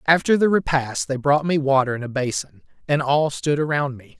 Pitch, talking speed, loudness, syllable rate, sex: 140 Hz, 215 wpm, -21 LUFS, 5.2 syllables/s, male